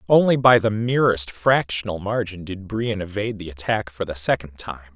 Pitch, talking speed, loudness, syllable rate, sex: 100 Hz, 180 wpm, -21 LUFS, 5.2 syllables/s, male